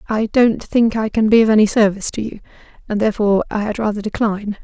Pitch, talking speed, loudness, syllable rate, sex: 215 Hz, 220 wpm, -17 LUFS, 6.7 syllables/s, female